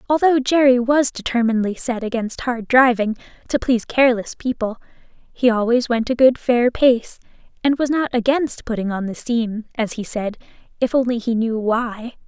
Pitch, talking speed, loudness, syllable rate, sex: 240 Hz, 170 wpm, -19 LUFS, 5.0 syllables/s, female